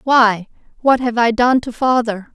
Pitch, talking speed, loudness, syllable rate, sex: 235 Hz, 180 wpm, -16 LUFS, 4.2 syllables/s, female